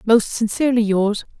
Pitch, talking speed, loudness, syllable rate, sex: 220 Hz, 130 wpm, -18 LUFS, 5.1 syllables/s, female